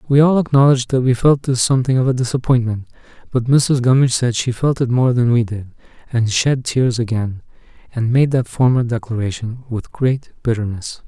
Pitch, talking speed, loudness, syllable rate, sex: 125 Hz, 185 wpm, -17 LUFS, 5.5 syllables/s, male